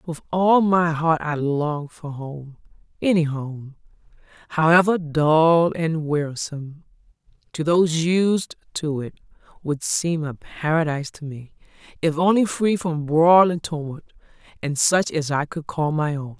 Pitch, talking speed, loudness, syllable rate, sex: 160 Hz, 145 wpm, -21 LUFS, 4.1 syllables/s, female